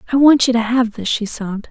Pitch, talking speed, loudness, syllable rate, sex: 235 Hz, 280 wpm, -16 LUFS, 6.3 syllables/s, female